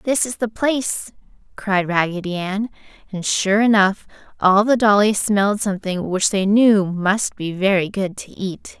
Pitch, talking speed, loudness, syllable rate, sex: 200 Hz, 165 wpm, -18 LUFS, 4.4 syllables/s, female